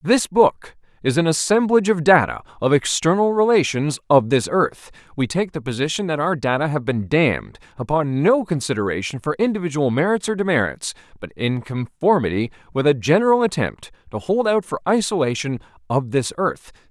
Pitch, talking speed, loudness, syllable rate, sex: 155 Hz, 165 wpm, -20 LUFS, 5.4 syllables/s, male